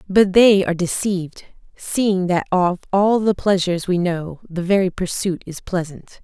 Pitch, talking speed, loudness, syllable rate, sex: 185 Hz, 165 wpm, -19 LUFS, 4.6 syllables/s, female